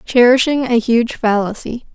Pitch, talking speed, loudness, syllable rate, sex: 235 Hz, 125 wpm, -14 LUFS, 4.5 syllables/s, female